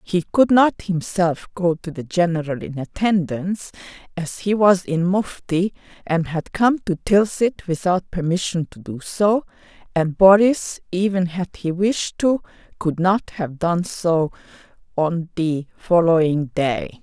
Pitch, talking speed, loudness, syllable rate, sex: 175 Hz, 145 wpm, -20 LUFS, 4.0 syllables/s, female